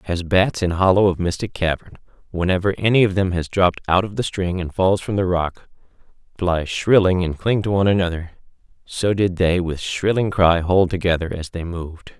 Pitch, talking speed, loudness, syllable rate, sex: 90 Hz, 195 wpm, -19 LUFS, 5.3 syllables/s, male